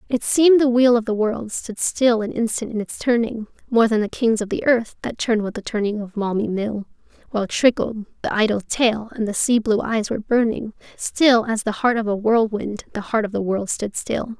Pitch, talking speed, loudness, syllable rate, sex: 225 Hz, 230 wpm, -20 LUFS, 5.2 syllables/s, female